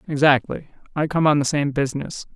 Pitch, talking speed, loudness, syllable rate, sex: 145 Hz, 180 wpm, -20 LUFS, 5.7 syllables/s, female